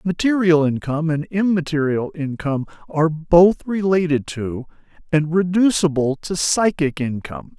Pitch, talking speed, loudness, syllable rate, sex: 160 Hz, 110 wpm, -19 LUFS, 4.7 syllables/s, male